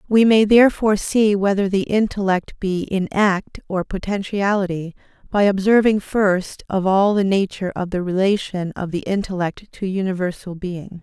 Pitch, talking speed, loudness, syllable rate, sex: 195 Hz, 150 wpm, -19 LUFS, 4.7 syllables/s, female